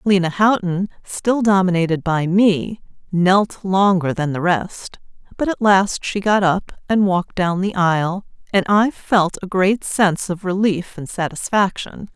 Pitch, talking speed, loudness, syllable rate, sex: 190 Hz, 160 wpm, -18 LUFS, 4.2 syllables/s, female